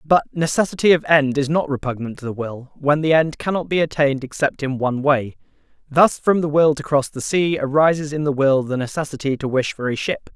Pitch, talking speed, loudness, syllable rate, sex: 145 Hz, 225 wpm, -19 LUFS, 5.7 syllables/s, male